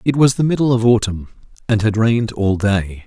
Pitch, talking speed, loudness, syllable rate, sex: 110 Hz, 215 wpm, -16 LUFS, 5.4 syllables/s, male